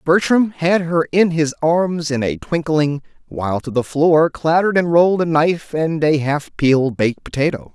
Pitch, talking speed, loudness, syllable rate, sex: 155 Hz, 185 wpm, -17 LUFS, 4.8 syllables/s, male